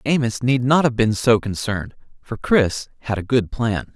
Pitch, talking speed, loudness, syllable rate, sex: 115 Hz, 195 wpm, -20 LUFS, 4.7 syllables/s, male